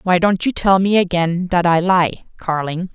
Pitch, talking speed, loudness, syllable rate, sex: 180 Hz, 185 wpm, -16 LUFS, 4.5 syllables/s, female